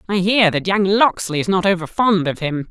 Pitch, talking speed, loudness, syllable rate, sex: 185 Hz, 245 wpm, -17 LUFS, 5.1 syllables/s, male